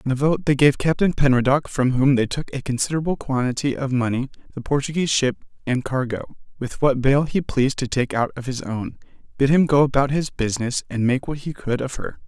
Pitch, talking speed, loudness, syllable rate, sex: 135 Hz, 220 wpm, -21 LUFS, 4.9 syllables/s, male